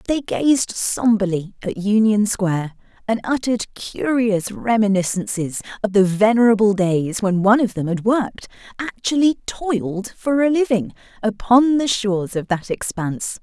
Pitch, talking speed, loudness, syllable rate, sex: 215 Hz, 140 wpm, -19 LUFS, 4.6 syllables/s, female